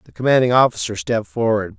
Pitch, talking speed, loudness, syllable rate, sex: 115 Hz, 170 wpm, -18 LUFS, 6.7 syllables/s, male